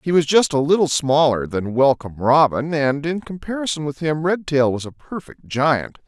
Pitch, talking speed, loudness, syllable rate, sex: 145 Hz, 190 wpm, -19 LUFS, 5.0 syllables/s, male